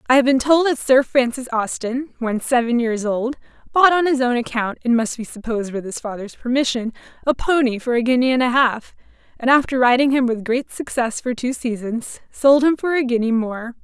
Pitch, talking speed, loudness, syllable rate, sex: 250 Hz, 210 wpm, -19 LUFS, 5.4 syllables/s, female